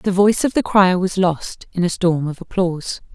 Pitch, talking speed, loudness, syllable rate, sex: 185 Hz, 230 wpm, -18 LUFS, 5.1 syllables/s, female